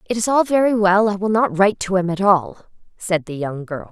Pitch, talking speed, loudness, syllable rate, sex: 195 Hz, 245 wpm, -18 LUFS, 5.5 syllables/s, female